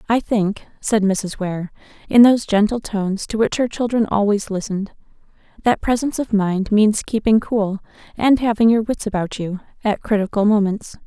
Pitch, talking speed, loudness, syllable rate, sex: 210 Hz, 170 wpm, -19 LUFS, 5.1 syllables/s, female